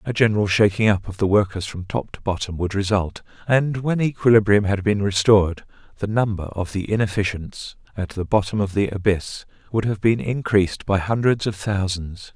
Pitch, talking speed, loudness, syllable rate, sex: 100 Hz, 185 wpm, -21 LUFS, 5.3 syllables/s, male